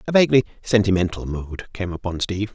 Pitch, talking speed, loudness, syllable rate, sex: 100 Hz, 165 wpm, -21 LUFS, 6.5 syllables/s, male